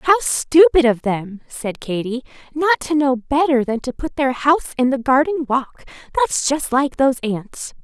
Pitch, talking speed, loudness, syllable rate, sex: 275 Hz, 185 wpm, -18 LUFS, 4.3 syllables/s, female